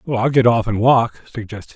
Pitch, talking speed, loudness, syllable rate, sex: 115 Hz, 205 wpm, -16 LUFS, 5.4 syllables/s, male